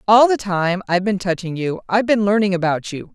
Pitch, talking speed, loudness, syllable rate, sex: 195 Hz, 230 wpm, -18 LUFS, 5.8 syllables/s, female